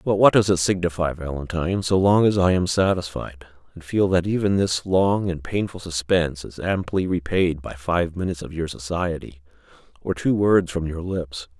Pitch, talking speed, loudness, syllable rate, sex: 85 Hz, 185 wpm, -22 LUFS, 5.0 syllables/s, male